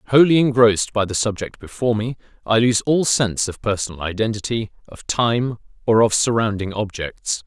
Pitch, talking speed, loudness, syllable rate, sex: 110 Hz, 160 wpm, -19 LUFS, 5.4 syllables/s, male